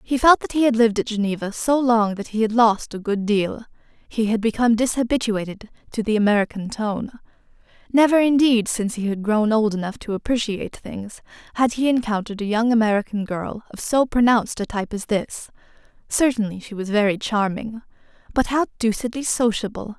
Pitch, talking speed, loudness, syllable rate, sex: 220 Hz, 175 wpm, -21 LUFS, 5.6 syllables/s, female